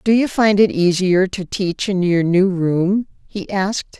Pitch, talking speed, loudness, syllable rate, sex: 190 Hz, 195 wpm, -17 LUFS, 4.1 syllables/s, female